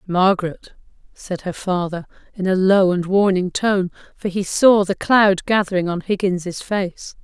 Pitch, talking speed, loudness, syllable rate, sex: 190 Hz, 155 wpm, -19 LUFS, 4.2 syllables/s, female